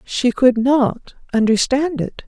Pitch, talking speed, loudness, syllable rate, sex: 250 Hz, 130 wpm, -17 LUFS, 3.5 syllables/s, female